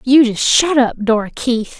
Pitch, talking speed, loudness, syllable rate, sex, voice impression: 245 Hz, 200 wpm, -14 LUFS, 4.2 syllables/s, female, feminine, adult-like, tensed, powerful, clear, fluent, intellectual, slightly friendly, lively, intense, sharp